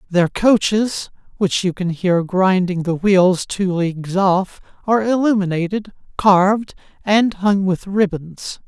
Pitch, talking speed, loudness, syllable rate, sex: 190 Hz, 130 wpm, -17 LUFS, 3.9 syllables/s, male